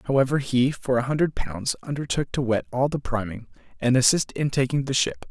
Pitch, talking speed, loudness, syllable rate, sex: 130 Hz, 205 wpm, -24 LUFS, 5.5 syllables/s, male